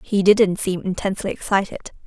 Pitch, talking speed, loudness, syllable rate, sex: 195 Hz, 145 wpm, -20 LUFS, 5.9 syllables/s, female